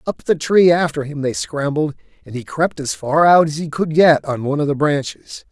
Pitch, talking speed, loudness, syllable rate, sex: 145 Hz, 240 wpm, -17 LUFS, 5.1 syllables/s, male